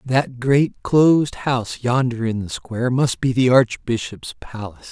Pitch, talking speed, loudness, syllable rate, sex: 125 Hz, 160 wpm, -19 LUFS, 4.4 syllables/s, male